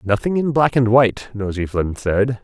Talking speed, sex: 195 wpm, male